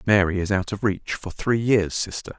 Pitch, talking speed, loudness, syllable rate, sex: 100 Hz, 250 wpm, -23 LUFS, 5.4 syllables/s, male